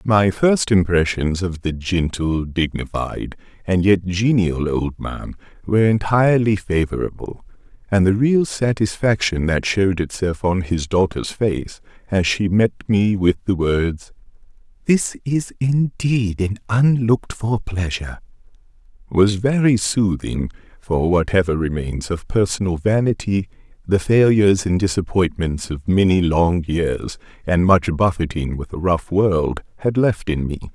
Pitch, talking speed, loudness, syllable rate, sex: 95 Hz, 135 wpm, -19 LUFS, 4.2 syllables/s, male